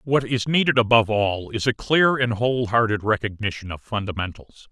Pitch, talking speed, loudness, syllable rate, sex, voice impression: 115 Hz, 165 wpm, -21 LUFS, 5.4 syllables/s, male, masculine, middle-aged, slightly muffled, slightly unique, slightly intense